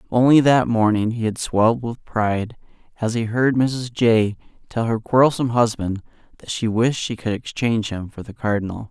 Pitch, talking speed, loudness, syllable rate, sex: 115 Hz, 180 wpm, -20 LUFS, 5.2 syllables/s, male